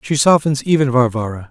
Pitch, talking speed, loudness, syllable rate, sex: 135 Hz, 160 wpm, -15 LUFS, 5.7 syllables/s, male